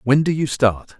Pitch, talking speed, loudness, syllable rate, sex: 135 Hz, 240 wpm, -19 LUFS, 4.6 syllables/s, male